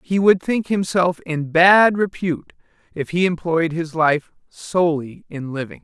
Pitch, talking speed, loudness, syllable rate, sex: 170 Hz, 155 wpm, -19 LUFS, 4.3 syllables/s, male